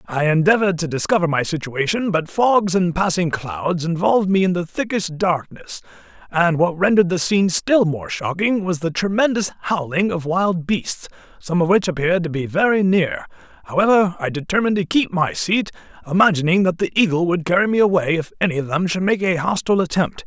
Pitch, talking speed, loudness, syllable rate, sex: 180 Hz, 190 wpm, -19 LUFS, 5.5 syllables/s, male